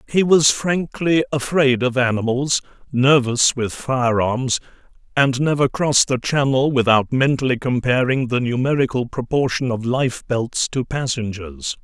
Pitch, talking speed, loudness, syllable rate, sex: 130 Hz, 120 wpm, -19 LUFS, 4.5 syllables/s, male